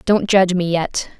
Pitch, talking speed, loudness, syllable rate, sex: 180 Hz, 200 wpm, -17 LUFS, 5.0 syllables/s, female